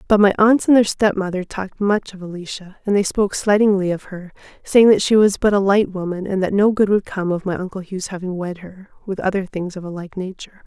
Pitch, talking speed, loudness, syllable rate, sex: 195 Hz, 250 wpm, -18 LUFS, 5.8 syllables/s, female